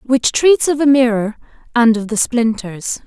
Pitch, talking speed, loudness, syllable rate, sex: 240 Hz, 175 wpm, -15 LUFS, 4.1 syllables/s, female